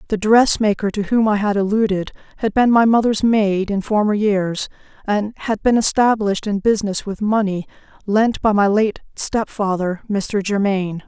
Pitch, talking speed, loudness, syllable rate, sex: 205 Hz, 175 wpm, -18 LUFS, 5.0 syllables/s, female